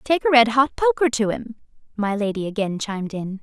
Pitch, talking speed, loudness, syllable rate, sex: 225 Hz, 210 wpm, -21 LUFS, 5.4 syllables/s, female